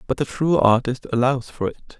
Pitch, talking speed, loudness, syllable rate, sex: 130 Hz, 210 wpm, -21 LUFS, 5.1 syllables/s, male